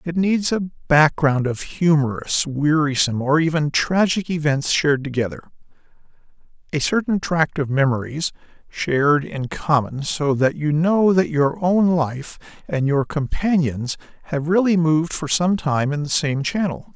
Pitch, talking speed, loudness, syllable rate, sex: 155 Hz, 150 wpm, -20 LUFS, 4.4 syllables/s, male